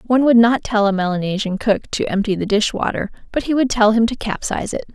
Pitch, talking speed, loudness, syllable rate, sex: 220 Hz, 245 wpm, -18 LUFS, 6.2 syllables/s, female